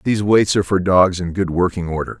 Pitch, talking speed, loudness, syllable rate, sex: 95 Hz, 245 wpm, -17 LUFS, 6.3 syllables/s, male